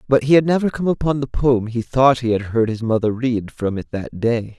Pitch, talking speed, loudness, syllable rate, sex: 125 Hz, 260 wpm, -19 LUFS, 5.2 syllables/s, male